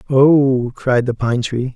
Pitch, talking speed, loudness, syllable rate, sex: 125 Hz, 170 wpm, -16 LUFS, 3.2 syllables/s, male